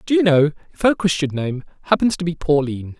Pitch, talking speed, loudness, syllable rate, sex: 160 Hz, 220 wpm, -19 LUFS, 6.4 syllables/s, male